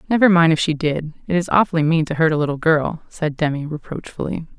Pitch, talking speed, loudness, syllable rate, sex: 160 Hz, 220 wpm, -19 LUFS, 6.1 syllables/s, female